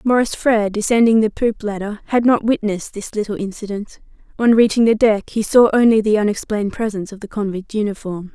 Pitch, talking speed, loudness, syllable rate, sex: 215 Hz, 185 wpm, -17 LUFS, 6.1 syllables/s, female